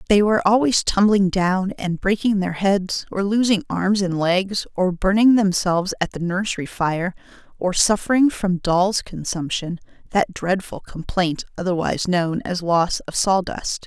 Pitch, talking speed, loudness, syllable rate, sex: 190 Hz, 150 wpm, -20 LUFS, 4.4 syllables/s, female